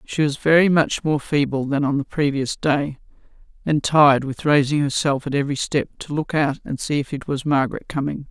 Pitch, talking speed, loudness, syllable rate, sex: 145 Hz, 210 wpm, -20 LUFS, 5.4 syllables/s, female